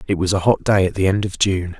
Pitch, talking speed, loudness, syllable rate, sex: 95 Hz, 335 wpm, -18 LUFS, 6.1 syllables/s, male